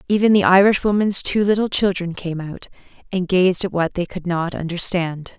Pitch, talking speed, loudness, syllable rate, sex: 185 Hz, 180 wpm, -19 LUFS, 5.0 syllables/s, female